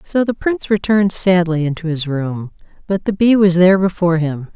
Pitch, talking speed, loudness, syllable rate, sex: 180 Hz, 200 wpm, -16 LUFS, 5.6 syllables/s, female